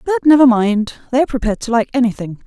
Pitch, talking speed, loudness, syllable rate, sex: 245 Hz, 220 wpm, -15 LUFS, 7.2 syllables/s, female